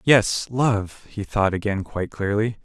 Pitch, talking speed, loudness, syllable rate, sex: 105 Hz, 135 wpm, -22 LUFS, 4.1 syllables/s, male